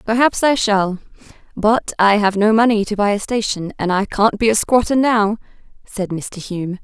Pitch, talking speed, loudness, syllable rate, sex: 210 Hz, 195 wpm, -17 LUFS, 4.7 syllables/s, female